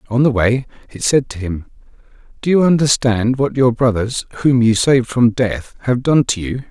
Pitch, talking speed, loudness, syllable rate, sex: 120 Hz, 195 wpm, -16 LUFS, 4.9 syllables/s, male